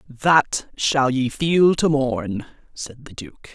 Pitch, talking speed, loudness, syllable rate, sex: 135 Hz, 150 wpm, -19 LUFS, 3.0 syllables/s, female